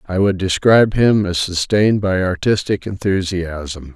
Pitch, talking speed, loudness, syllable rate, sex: 95 Hz, 135 wpm, -16 LUFS, 4.4 syllables/s, male